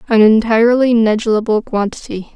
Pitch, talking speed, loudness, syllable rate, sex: 220 Hz, 100 wpm, -13 LUFS, 5.5 syllables/s, female